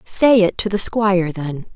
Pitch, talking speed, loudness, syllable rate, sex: 195 Hz, 205 wpm, -17 LUFS, 4.4 syllables/s, female